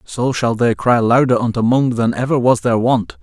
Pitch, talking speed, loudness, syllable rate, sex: 120 Hz, 225 wpm, -15 LUFS, 4.9 syllables/s, male